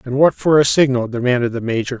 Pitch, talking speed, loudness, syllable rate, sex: 130 Hz, 240 wpm, -16 LUFS, 6.4 syllables/s, male